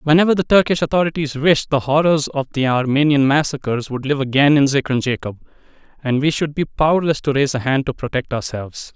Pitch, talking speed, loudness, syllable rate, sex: 140 Hz, 195 wpm, -17 LUFS, 6.0 syllables/s, male